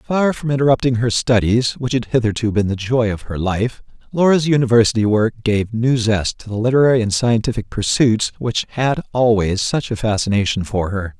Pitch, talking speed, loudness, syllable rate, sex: 115 Hz, 180 wpm, -17 LUFS, 5.2 syllables/s, male